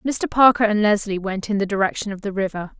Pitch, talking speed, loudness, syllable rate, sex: 205 Hz, 235 wpm, -20 LUFS, 5.8 syllables/s, female